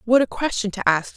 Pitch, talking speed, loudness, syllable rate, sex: 225 Hz, 260 wpm, -21 LUFS, 5.8 syllables/s, female